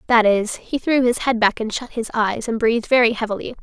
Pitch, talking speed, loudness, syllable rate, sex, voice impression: 230 Hz, 250 wpm, -19 LUFS, 5.6 syllables/s, female, feminine, slightly young, tensed, powerful, bright, soft, clear, fluent, slightly cute, intellectual, friendly, reassuring, elegant, kind